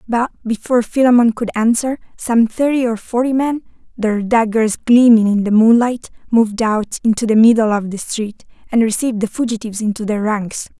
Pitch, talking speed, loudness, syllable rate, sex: 225 Hz, 170 wpm, -15 LUFS, 5.3 syllables/s, female